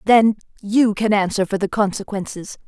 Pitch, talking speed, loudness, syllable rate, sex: 205 Hz, 155 wpm, -19 LUFS, 4.9 syllables/s, female